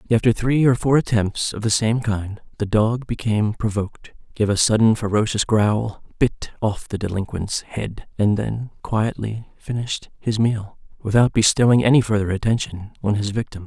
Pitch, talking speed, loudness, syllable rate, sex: 110 Hz, 160 wpm, -21 LUFS, 4.8 syllables/s, male